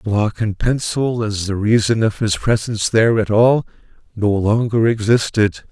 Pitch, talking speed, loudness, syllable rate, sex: 110 Hz, 160 wpm, -17 LUFS, 4.5 syllables/s, male